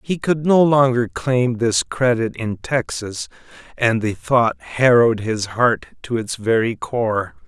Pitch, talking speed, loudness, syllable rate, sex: 120 Hz, 155 wpm, -19 LUFS, 3.8 syllables/s, male